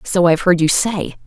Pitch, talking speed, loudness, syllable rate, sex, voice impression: 180 Hz, 285 wpm, -15 LUFS, 5.4 syllables/s, female, feminine, adult-like, tensed, powerful, clear, fluent, intellectual, calm, elegant, lively, slightly strict, sharp